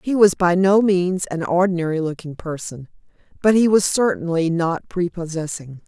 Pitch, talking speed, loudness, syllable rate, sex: 175 Hz, 155 wpm, -19 LUFS, 4.9 syllables/s, female